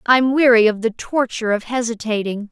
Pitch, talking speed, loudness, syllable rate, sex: 230 Hz, 165 wpm, -17 LUFS, 5.4 syllables/s, female